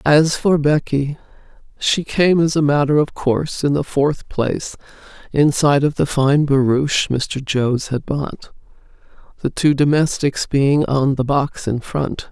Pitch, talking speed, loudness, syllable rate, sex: 140 Hz, 155 wpm, -17 LUFS, 4.2 syllables/s, female